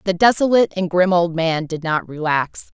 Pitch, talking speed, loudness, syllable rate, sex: 175 Hz, 195 wpm, -18 LUFS, 5.1 syllables/s, female